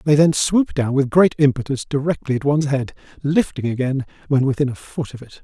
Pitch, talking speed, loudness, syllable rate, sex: 140 Hz, 210 wpm, -19 LUFS, 5.6 syllables/s, male